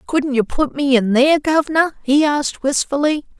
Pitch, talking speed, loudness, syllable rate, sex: 285 Hz, 175 wpm, -17 LUFS, 5.2 syllables/s, female